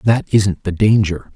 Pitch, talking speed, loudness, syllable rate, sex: 100 Hz, 175 wpm, -16 LUFS, 4.2 syllables/s, male